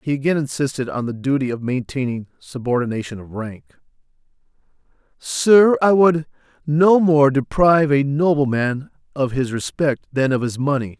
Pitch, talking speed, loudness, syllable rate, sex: 135 Hz, 140 wpm, -18 LUFS, 4.9 syllables/s, male